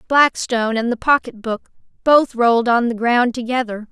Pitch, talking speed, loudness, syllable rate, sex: 240 Hz, 170 wpm, -17 LUFS, 5.0 syllables/s, female